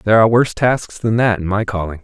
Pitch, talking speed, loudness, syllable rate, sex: 105 Hz, 265 wpm, -16 LUFS, 6.5 syllables/s, male